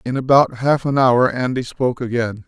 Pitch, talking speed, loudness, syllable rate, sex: 125 Hz, 195 wpm, -17 LUFS, 5.1 syllables/s, male